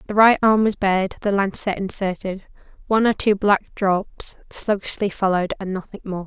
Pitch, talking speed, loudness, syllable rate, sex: 200 Hz, 170 wpm, -21 LUFS, 5.2 syllables/s, female